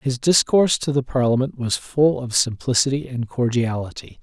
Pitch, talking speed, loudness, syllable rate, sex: 130 Hz, 155 wpm, -20 LUFS, 5.0 syllables/s, male